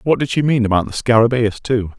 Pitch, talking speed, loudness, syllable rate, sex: 115 Hz, 240 wpm, -16 LUFS, 5.9 syllables/s, male